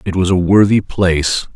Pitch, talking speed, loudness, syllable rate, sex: 90 Hz, 195 wpm, -13 LUFS, 5.0 syllables/s, male